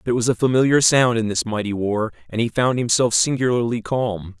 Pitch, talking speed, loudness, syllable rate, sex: 115 Hz, 220 wpm, -19 LUFS, 5.6 syllables/s, male